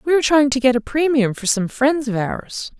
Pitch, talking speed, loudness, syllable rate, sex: 260 Hz, 260 wpm, -18 LUFS, 5.3 syllables/s, female